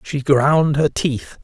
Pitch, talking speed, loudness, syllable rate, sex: 140 Hz, 170 wpm, -17 LUFS, 3.0 syllables/s, male